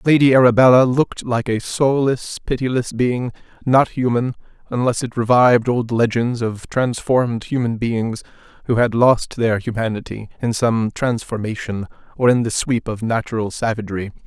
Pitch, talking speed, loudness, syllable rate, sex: 120 Hz, 145 wpm, -18 LUFS, 4.9 syllables/s, male